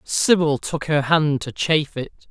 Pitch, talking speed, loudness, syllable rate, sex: 150 Hz, 180 wpm, -20 LUFS, 4.4 syllables/s, male